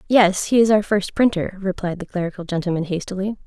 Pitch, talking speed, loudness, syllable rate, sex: 190 Hz, 190 wpm, -20 LUFS, 6.0 syllables/s, female